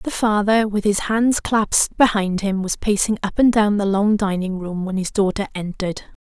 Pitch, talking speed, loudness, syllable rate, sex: 205 Hz, 200 wpm, -19 LUFS, 4.8 syllables/s, female